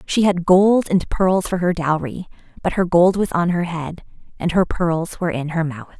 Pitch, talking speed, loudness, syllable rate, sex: 175 Hz, 220 wpm, -19 LUFS, 4.7 syllables/s, female